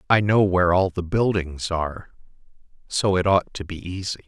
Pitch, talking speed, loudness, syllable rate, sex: 90 Hz, 180 wpm, -22 LUFS, 5.3 syllables/s, male